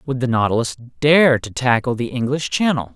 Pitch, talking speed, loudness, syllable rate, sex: 130 Hz, 185 wpm, -18 LUFS, 5.0 syllables/s, male